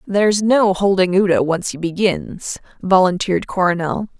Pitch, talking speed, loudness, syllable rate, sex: 190 Hz, 130 wpm, -17 LUFS, 4.7 syllables/s, female